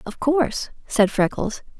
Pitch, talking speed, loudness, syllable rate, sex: 245 Hz, 135 wpm, -22 LUFS, 4.3 syllables/s, female